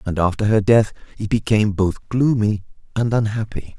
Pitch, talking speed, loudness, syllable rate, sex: 105 Hz, 160 wpm, -19 LUFS, 5.1 syllables/s, male